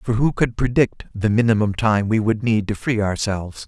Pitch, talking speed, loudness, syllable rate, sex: 110 Hz, 215 wpm, -20 LUFS, 5.1 syllables/s, male